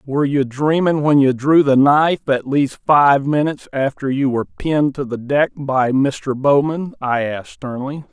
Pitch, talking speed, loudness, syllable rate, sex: 140 Hz, 185 wpm, -17 LUFS, 4.7 syllables/s, male